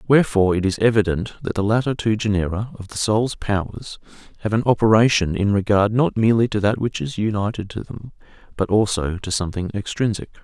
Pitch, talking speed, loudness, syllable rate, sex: 105 Hz, 185 wpm, -20 LUFS, 6.0 syllables/s, male